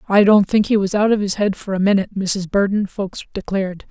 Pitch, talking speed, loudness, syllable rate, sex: 200 Hz, 245 wpm, -18 LUFS, 5.9 syllables/s, female